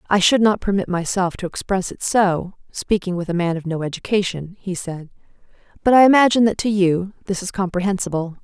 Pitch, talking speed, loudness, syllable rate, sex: 190 Hz, 190 wpm, -19 LUFS, 5.7 syllables/s, female